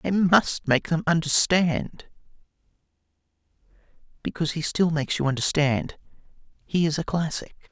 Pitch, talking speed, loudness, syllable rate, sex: 140 Hz, 115 wpm, -23 LUFS, 4.9 syllables/s, male